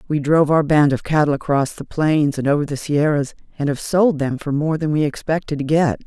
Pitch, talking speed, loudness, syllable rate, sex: 150 Hz, 240 wpm, -18 LUFS, 5.5 syllables/s, female